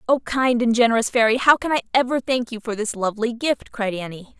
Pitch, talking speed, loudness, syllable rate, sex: 235 Hz, 230 wpm, -20 LUFS, 5.9 syllables/s, female